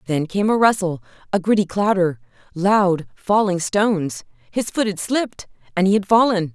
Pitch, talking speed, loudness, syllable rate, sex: 190 Hz, 165 wpm, -19 LUFS, 4.9 syllables/s, female